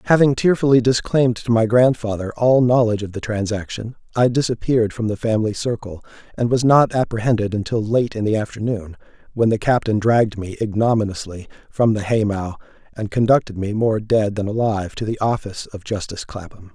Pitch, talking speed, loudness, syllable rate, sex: 110 Hz, 170 wpm, -19 LUFS, 5.8 syllables/s, male